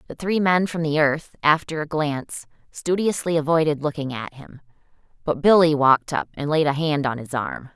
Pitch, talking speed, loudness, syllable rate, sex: 150 Hz, 195 wpm, -21 LUFS, 5.2 syllables/s, female